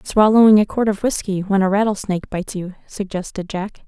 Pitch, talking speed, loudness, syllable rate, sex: 200 Hz, 185 wpm, -18 LUFS, 5.8 syllables/s, female